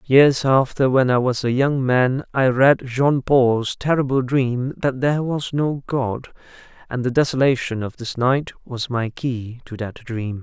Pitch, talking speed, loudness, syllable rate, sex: 130 Hz, 180 wpm, -20 LUFS, 4.0 syllables/s, male